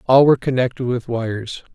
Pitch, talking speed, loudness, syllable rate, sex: 125 Hz, 170 wpm, -18 LUFS, 5.8 syllables/s, male